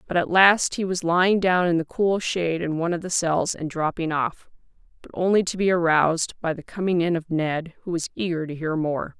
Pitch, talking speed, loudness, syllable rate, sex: 170 Hz, 235 wpm, -23 LUFS, 5.4 syllables/s, female